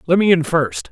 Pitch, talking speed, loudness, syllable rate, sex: 155 Hz, 265 wpm, -16 LUFS, 5.2 syllables/s, male